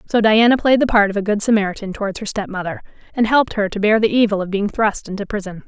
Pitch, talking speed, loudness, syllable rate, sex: 210 Hz, 255 wpm, -17 LUFS, 6.7 syllables/s, female